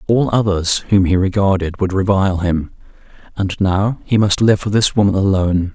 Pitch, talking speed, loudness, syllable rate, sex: 95 Hz, 180 wpm, -16 LUFS, 5.1 syllables/s, male